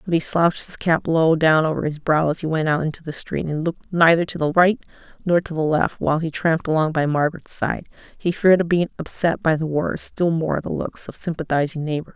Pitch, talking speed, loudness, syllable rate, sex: 160 Hz, 235 wpm, -21 LUFS, 5.7 syllables/s, female